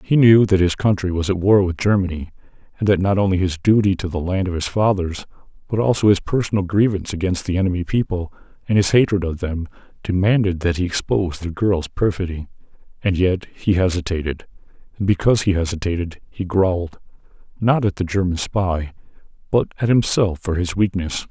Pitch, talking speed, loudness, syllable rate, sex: 95 Hz, 175 wpm, -19 LUFS, 5.7 syllables/s, male